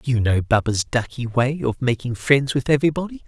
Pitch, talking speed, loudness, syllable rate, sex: 130 Hz, 185 wpm, -20 LUFS, 5.4 syllables/s, male